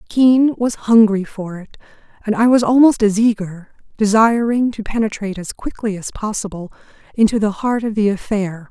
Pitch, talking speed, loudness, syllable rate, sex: 215 Hz, 165 wpm, -16 LUFS, 5.2 syllables/s, female